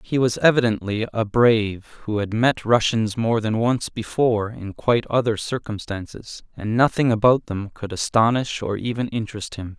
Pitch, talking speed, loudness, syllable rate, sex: 110 Hz, 165 wpm, -21 LUFS, 4.9 syllables/s, male